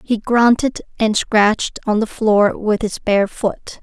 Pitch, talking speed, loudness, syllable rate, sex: 215 Hz, 175 wpm, -17 LUFS, 3.7 syllables/s, female